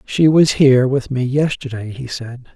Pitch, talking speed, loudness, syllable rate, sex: 130 Hz, 190 wpm, -16 LUFS, 4.7 syllables/s, male